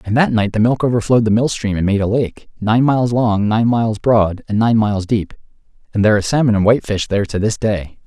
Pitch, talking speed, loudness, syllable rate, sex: 110 Hz, 245 wpm, -16 LUFS, 6.2 syllables/s, male